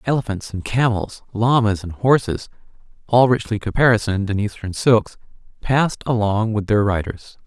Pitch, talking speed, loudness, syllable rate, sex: 110 Hz, 135 wpm, -19 LUFS, 5.0 syllables/s, male